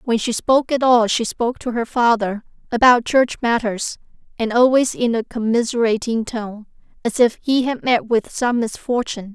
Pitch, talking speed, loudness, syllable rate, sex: 235 Hz, 175 wpm, -18 LUFS, 4.9 syllables/s, female